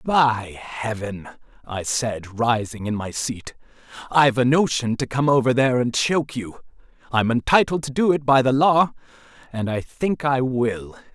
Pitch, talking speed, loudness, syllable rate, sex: 125 Hz, 165 wpm, -21 LUFS, 4.6 syllables/s, male